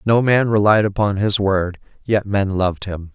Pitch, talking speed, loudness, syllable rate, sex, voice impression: 100 Hz, 190 wpm, -18 LUFS, 4.6 syllables/s, male, very masculine, adult-like, fluent, intellectual, calm, slightly mature, elegant